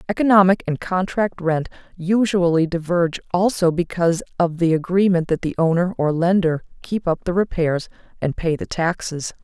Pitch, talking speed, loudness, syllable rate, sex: 175 Hz, 155 wpm, -20 LUFS, 5.1 syllables/s, female